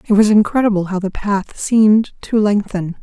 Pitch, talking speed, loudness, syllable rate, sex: 205 Hz, 180 wpm, -15 LUFS, 4.9 syllables/s, female